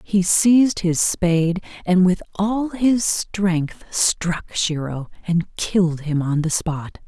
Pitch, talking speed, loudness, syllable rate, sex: 180 Hz, 145 wpm, -20 LUFS, 3.3 syllables/s, female